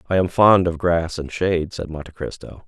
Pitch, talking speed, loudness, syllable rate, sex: 85 Hz, 225 wpm, -20 LUFS, 5.3 syllables/s, male